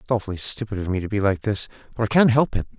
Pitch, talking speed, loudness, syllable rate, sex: 105 Hz, 300 wpm, -22 LUFS, 7.1 syllables/s, male